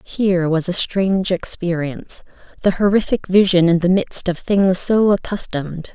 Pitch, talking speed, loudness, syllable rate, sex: 185 Hz, 140 wpm, -17 LUFS, 4.8 syllables/s, female